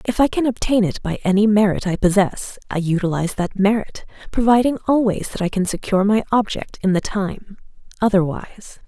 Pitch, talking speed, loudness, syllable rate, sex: 205 Hz, 175 wpm, -19 LUFS, 5.9 syllables/s, female